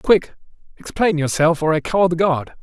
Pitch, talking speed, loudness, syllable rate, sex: 170 Hz, 185 wpm, -18 LUFS, 4.8 syllables/s, male